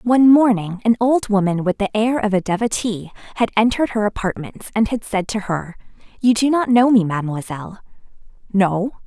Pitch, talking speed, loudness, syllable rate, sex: 210 Hz, 180 wpm, -18 LUFS, 5.6 syllables/s, female